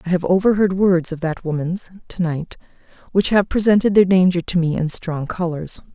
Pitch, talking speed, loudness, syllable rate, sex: 180 Hz, 190 wpm, -18 LUFS, 5.2 syllables/s, female